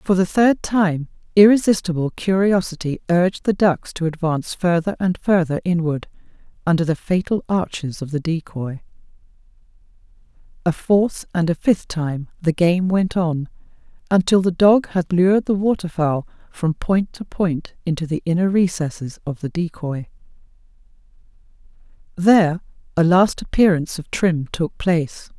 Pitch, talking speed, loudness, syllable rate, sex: 175 Hz, 140 wpm, -19 LUFS, 4.7 syllables/s, female